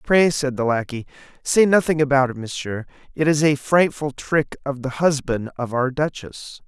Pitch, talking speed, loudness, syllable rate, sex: 140 Hz, 180 wpm, -20 LUFS, 4.7 syllables/s, male